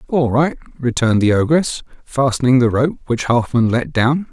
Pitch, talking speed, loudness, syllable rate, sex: 130 Hz, 165 wpm, -16 LUFS, 4.7 syllables/s, male